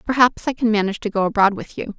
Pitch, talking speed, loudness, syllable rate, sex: 215 Hz, 270 wpm, -19 LUFS, 7.2 syllables/s, female